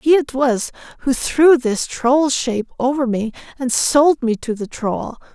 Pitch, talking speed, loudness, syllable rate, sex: 260 Hz, 180 wpm, -18 LUFS, 4.0 syllables/s, female